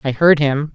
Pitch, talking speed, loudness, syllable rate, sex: 145 Hz, 240 wpm, -15 LUFS, 4.6 syllables/s, female